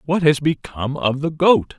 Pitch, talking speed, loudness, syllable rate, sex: 150 Hz, 200 wpm, -19 LUFS, 4.9 syllables/s, male